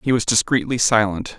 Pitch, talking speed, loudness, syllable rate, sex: 115 Hz, 175 wpm, -18 LUFS, 5.4 syllables/s, male